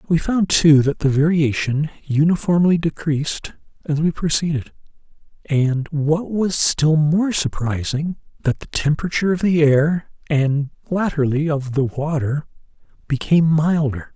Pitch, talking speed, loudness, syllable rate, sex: 155 Hz, 125 wpm, -19 LUFS, 4.4 syllables/s, male